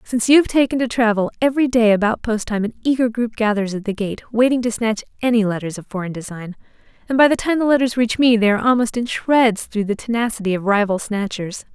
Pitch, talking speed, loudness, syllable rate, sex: 225 Hz, 230 wpm, -18 LUFS, 6.2 syllables/s, female